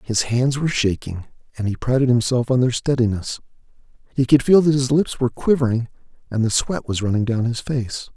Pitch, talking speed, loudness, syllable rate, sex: 125 Hz, 200 wpm, -20 LUFS, 5.7 syllables/s, male